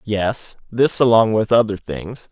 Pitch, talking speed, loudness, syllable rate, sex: 110 Hz, 155 wpm, -17 LUFS, 3.9 syllables/s, male